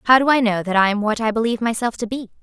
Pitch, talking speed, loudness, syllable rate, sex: 225 Hz, 320 wpm, -19 LUFS, 7.4 syllables/s, female